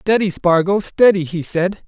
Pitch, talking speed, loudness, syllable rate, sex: 185 Hz, 160 wpm, -16 LUFS, 4.4 syllables/s, male